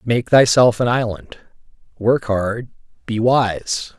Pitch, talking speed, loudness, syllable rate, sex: 115 Hz, 120 wpm, -17 LUFS, 3.3 syllables/s, male